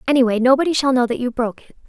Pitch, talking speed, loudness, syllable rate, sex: 250 Hz, 255 wpm, -17 LUFS, 7.8 syllables/s, female